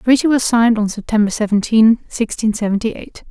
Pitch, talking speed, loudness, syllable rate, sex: 220 Hz, 180 wpm, -16 LUFS, 6.1 syllables/s, female